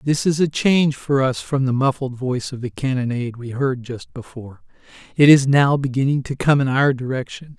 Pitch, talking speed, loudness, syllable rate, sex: 135 Hz, 205 wpm, -19 LUFS, 5.5 syllables/s, male